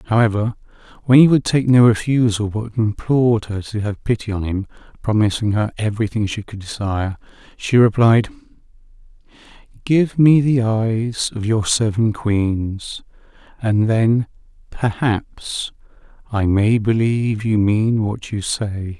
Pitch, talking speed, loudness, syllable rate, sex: 110 Hz, 135 wpm, -18 LUFS, 4.2 syllables/s, male